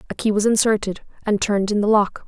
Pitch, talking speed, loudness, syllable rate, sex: 210 Hz, 235 wpm, -20 LUFS, 6.4 syllables/s, female